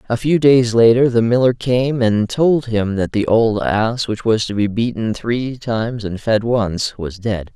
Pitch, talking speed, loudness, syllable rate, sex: 115 Hz, 205 wpm, -17 LUFS, 4.1 syllables/s, male